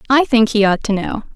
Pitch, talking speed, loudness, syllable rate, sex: 230 Hz, 265 wpm, -15 LUFS, 5.5 syllables/s, female